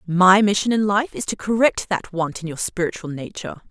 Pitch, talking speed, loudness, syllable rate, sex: 190 Hz, 210 wpm, -20 LUFS, 5.4 syllables/s, female